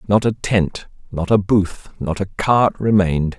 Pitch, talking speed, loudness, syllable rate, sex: 95 Hz, 175 wpm, -18 LUFS, 4.1 syllables/s, male